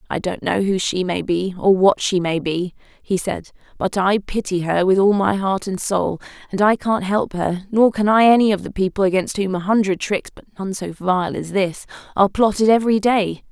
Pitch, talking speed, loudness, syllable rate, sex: 195 Hz, 225 wpm, -19 LUFS, 5.1 syllables/s, female